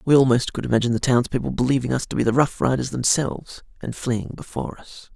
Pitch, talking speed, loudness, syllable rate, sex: 125 Hz, 210 wpm, -22 LUFS, 6.5 syllables/s, male